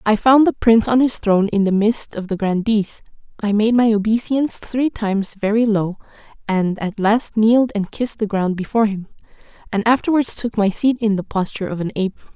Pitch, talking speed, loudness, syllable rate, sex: 215 Hz, 205 wpm, -18 LUFS, 5.7 syllables/s, female